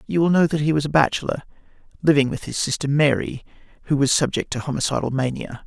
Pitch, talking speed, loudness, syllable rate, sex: 145 Hz, 200 wpm, -21 LUFS, 6.4 syllables/s, male